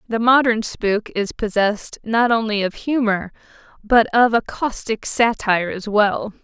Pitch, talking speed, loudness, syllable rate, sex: 215 Hz, 150 wpm, -19 LUFS, 4.3 syllables/s, female